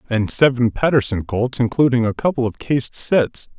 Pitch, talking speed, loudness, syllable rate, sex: 125 Hz, 165 wpm, -18 LUFS, 5.1 syllables/s, male